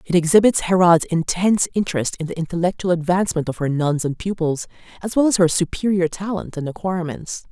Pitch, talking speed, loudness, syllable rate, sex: 175 Hz, 175 wpm, -19 LUFS, 6.1 syllables/s, female